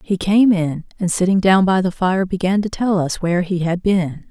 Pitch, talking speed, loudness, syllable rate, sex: 185 Hz, 235 wpm, -17 LUFS, 4.9 syllables/s, female